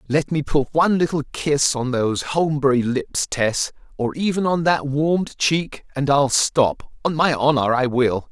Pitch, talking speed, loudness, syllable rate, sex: 140 Hz, 175 wpm, -20 LUFS, 4.4 syllables/s, male